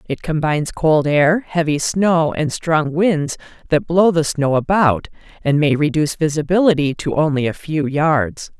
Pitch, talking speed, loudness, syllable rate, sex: 160 Hz, 160 wpm, -17 LUFS, 4.4 syllables/s, female